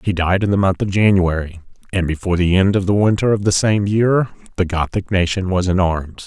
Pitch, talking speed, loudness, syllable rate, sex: 95 Hz, 230 wpm, -17 LUFS, 5.6 syllables/s, male